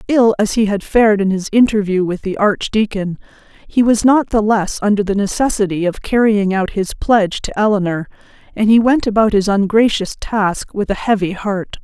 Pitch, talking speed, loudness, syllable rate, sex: 205 Hz, 190 wpm, -15 LUFS, 5.1 syllables/s, female